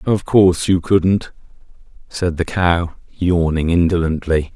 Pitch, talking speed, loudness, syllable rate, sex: 85 Hz, 120 wpm, -17 LUFS, 3.9 syllables/s, male